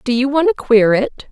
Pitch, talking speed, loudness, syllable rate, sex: 255 Hz, 275 wpm, -14 LUFS, 5.4 syllables/s, female